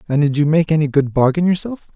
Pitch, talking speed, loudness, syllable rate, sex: 155 Hz, 245 wpm, -16 LUFS, 6.2 syllables/s, male